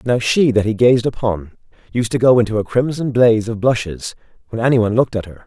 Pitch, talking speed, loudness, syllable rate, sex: 115 Hz, 230 wpm, -16 LUFS, 6.2 syllables/s, male